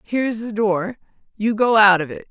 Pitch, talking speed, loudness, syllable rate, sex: 210 Hz, 210 wpm, -18 LUFS, 5.0 syllables/s, female